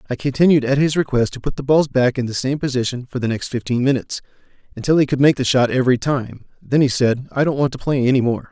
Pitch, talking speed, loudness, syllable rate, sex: 130 Hz, 255 wpm, -18 LUFS, 6.5 syllables/s, male